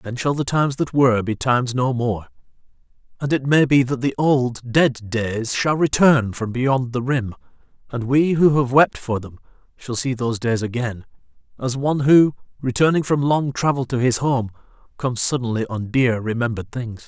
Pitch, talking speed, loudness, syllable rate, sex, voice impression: 125 Hz, 185 wpm, -20 LUFS, 5.0 syllables/s, male, masculine, adult-like, slightly cool, slightly refreshing, sincere, slightly elegant